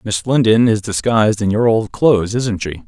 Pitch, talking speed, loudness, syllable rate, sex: 110 Hz, 210 wpm, -15 LUFS, 5.1 syllables/s, male